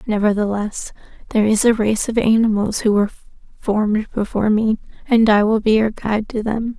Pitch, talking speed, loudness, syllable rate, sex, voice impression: 215 Hz, 175 wpm, -18 LUFS, 5.6 syllables/s, female, feminine, slightly young, relaxed, slightly weak, slightly dark, slightly muffled, slightly cute, calm, friendly, slightly reassuring, kind, modest